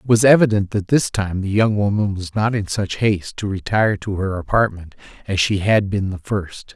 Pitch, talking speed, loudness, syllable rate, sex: 100 Hz, 220 wpm, -19 LUFS, 5.2 syllables/s, male